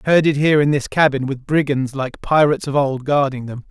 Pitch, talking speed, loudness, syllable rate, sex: 140 Hz, 210 wpm, -17 LUFS, 5.7 syllables/s, male